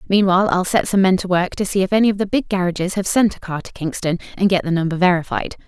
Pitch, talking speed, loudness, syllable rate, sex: 185 Hz, 275 wpm, -18 LUFS, 6.7 syllables/s, female